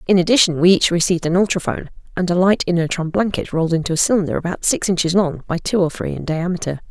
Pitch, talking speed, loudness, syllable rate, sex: 175 Hz, 225 wpm, -18 LUFS, 6.9 syllables/s, female